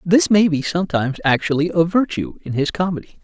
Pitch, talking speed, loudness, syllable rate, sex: 170 Hz, 185 wpm, -18 LUFS, 5.9 syllables/s, male